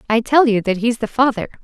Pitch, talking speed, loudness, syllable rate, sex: 230 Hz, 260 wpm, -16 LUFS, 6.1 syllables/s, female